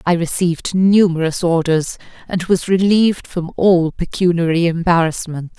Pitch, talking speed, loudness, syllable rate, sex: 175 Hz, 120 wpm, -16 LUFS, 4.6 syllables/s, female